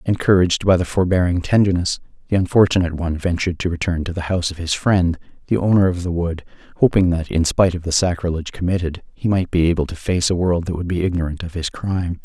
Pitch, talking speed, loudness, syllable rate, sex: 90 Hz, 220 wpm, -19 LUFS, 6.6 syllables/s, male